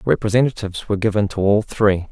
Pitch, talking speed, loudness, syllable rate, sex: 105 Hz, 170 wpm, -19 LUFS, 6.5 syllables/s, male